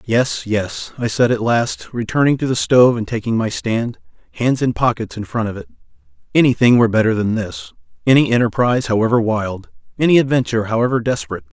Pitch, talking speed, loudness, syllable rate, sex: 120 Hz, 175 wpm, -17 LUFS, 6.0 syllables/s, male